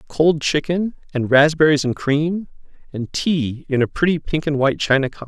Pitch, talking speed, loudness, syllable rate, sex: 150 Hz, 180 wpm, -19 LUFS, 4.9 syllables/s, male